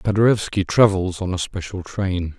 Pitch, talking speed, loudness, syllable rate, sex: 95 Hz, 150 wpm, -20 LUFS, 4.8 syllables/s, male